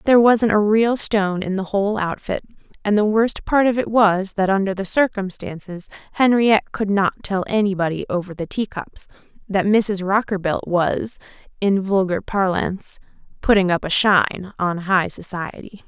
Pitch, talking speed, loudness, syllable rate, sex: 200 Hz, 160 wpm, -19 LUFS, 4.8 syllables/s, female